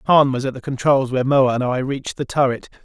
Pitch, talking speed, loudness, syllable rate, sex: 130 Hz, 255 wpm, -19 LUFS, 5.9 syllables/s, male